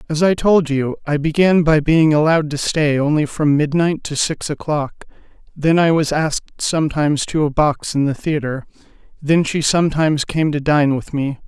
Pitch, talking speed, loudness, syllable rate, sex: 150 Hz, 190 wpm, -17 LUFS, 5.0 syllables/s, male